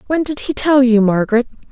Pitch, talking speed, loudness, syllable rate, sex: 250 Hz, 210 wpm, -14 LUFS, 6.0 syllables/s, female